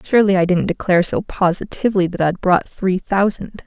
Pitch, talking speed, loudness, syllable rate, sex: 185 Hz, 180 wpm, -17 LUFS, 5.6 syllables/s, female